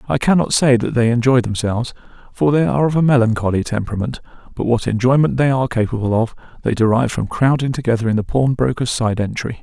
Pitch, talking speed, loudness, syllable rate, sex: 120 Hz, 195 wpm, -17 LUFS, 6.5 syllables/s, male